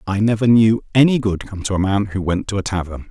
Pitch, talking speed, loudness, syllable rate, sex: 100 Hz, 270 wpm, -18 LUFS, 5.9 syllables/s, male